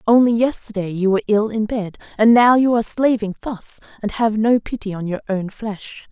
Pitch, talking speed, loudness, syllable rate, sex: 215 Hz, 205 wpm, -18 LUFS, 5.3 syllables/s, female